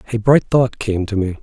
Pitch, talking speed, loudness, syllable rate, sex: 110 Hz, 250 wpm, -17 LUFS, 5.1 syllables/s, male